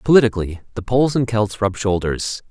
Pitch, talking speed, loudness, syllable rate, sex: 110 Hz, 170 wpm, -19 LUFS, 5.9 syllables/s, male